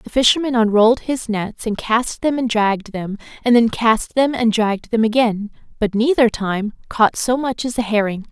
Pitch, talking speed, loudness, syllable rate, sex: 225 Hz, 200 wpm, -18 LUFS, 4.9 syllables/s, female